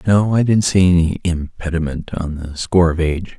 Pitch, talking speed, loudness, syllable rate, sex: 85 Hz, 195 wpm, -17 LUFS, 5.3 syllables/s, male